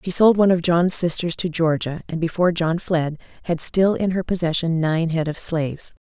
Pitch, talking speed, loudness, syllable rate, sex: 170 Hz, 210 wpm, -20 LUFS, 5.3 syllables/s, female